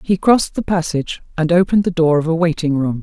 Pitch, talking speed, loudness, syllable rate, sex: 170 Hz, 240 wpm, -16 LUFS, 6.5 syllables/s, female